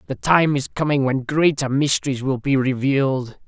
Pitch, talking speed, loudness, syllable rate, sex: 135 Hz, 175 wpm, -20 LUFS, 5.0 syllables/s, male